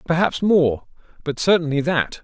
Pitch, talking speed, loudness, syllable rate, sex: 155 Hz, 135 wpm, -19 LUFS, 4.6 syllables/s, male